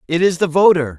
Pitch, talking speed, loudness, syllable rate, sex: 165 Hz, 245 wpm, -14 LUFS, 6.0 syllables/s, male